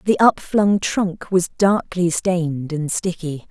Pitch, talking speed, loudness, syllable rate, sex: 180 Hz, 155 wpm, -19 LUFS, 3.7 syllables/s, female